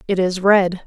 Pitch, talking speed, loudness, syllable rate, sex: 190 Hz, 205 wpm, -16 LUFS, 4.2 syllables/s, female